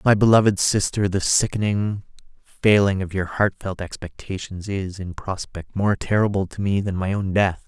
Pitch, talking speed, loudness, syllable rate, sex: 100 Hz, 170 wpm, -21 LUFS, 4.8 syllables/s, male